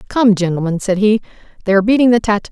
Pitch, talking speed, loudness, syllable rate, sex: 210 Hz, 215 wpm, -14 LUFS, 7.5 syllables/s, female